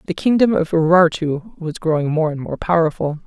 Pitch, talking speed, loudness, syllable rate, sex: 165 Hz, 185 wpm, -18 LUFS, 5.3 syllables/s, female